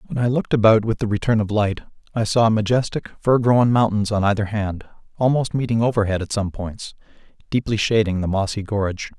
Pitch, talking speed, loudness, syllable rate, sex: 110 Hz, 190 wpm, -20 LUFS, 5.7 syllables/s, male